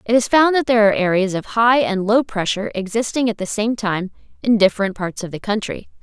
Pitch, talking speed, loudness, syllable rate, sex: 215 Hz, 230 wpm, -18 LUFS, 6.1 syllables/s, female